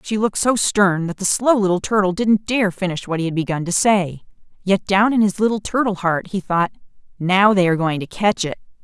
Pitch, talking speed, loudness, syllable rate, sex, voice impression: 195 Hz, 230 wpm, -18 LUFS, 5.5 syllables/s, female, feminine, adult-like, clear, fluent, slightly intellectual